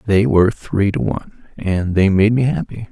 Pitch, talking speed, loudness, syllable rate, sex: 105 Hz, 185 wpm, -17 LUFS, 4.9 syllables/s, male